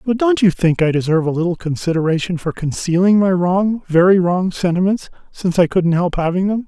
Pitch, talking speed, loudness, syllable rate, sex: 180 Hz, 200 wpm, -16 LUFS, 5.7 syllables/s, male